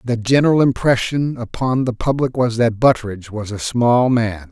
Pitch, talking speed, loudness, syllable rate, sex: 120 Hz, 175 wpm, -17 LUFS, 5.1 syllables/s, male